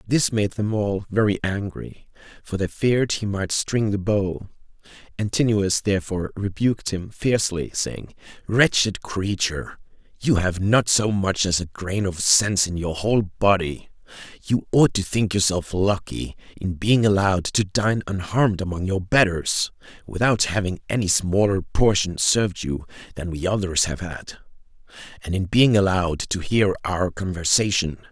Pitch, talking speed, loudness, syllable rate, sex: 100 Hz, 150 wpm, -22 LUFS, 4.6 syllables/s, male